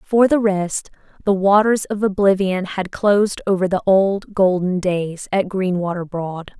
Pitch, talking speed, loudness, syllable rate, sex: 190 Hz, 155 wpm, -18 LUFS, 4.2 syllables/s, female